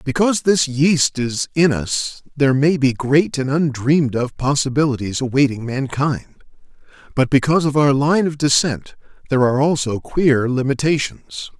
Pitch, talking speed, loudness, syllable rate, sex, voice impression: 140 Hz, 145 wpm, -18 LUFS, 4.9 syllables/s, male, masculine, adult-like, tensed, powerful, bright, clear, slightly raspy, cool, intellectual, mature, slightly friendly, wild, lively, slightly strict